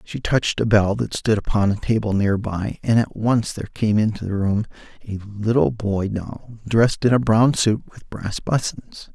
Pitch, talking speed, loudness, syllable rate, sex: 110 Hz, 205 wpm, -21 LUFS, 4.7 syllables/s, male